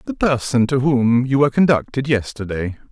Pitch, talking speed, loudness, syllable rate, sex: 130 Hz, 165 wpm, -18 LUFS, 5.3 syllables/s, male